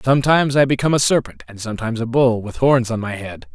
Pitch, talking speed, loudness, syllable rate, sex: 125 Hz, 235 wpm, -18 LUFS, 6.8 syllables/s, male